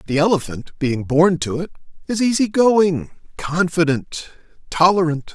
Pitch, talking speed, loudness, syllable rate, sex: 170 Hz, 125 wpm, -18 LUFS, 4.4 syllables/s, male